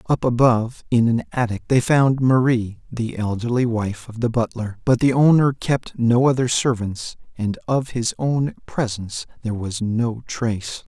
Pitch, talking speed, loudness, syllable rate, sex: 120 Hz, 165 wpm, -20 LUFS, 4.6 syllables/s, male